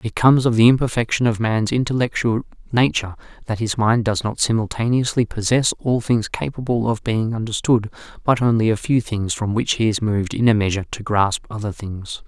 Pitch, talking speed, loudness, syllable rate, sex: 115 Hz, 190 wpm, -19 LUFS, 5.6 syllables/s, male